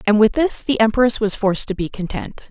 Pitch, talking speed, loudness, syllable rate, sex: 215 Hz, 240 wpm, -18 LUFS, 5.5 syllables/s, female